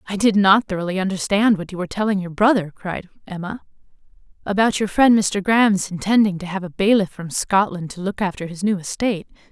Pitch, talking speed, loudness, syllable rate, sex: 195 Hz, 195 wpm, -19 LUFS, 5.9 syllables/s, female